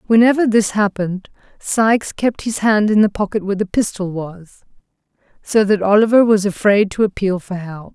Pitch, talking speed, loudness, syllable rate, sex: 205 Hz, 175 wpm, -16 LUFS, 5.2 syllables/s, female